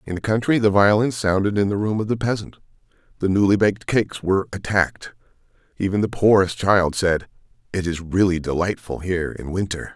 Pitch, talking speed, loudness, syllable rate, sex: 100 Hz, 180 wpm, -20 LUFS, 5.8 syllables/s, male